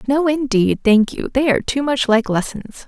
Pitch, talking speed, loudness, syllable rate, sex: 250 Hz, 210 wpm, -17 LUFS, 5.0 syllables/s, female